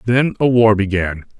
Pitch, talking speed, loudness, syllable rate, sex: 110 Hz, 170 wpm, -15 LUFS, 4.8 syllables/s, male